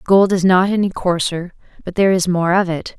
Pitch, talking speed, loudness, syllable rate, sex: 185 Hz, 240 wpm, -16 LUFS, 6.1 syllables/s, female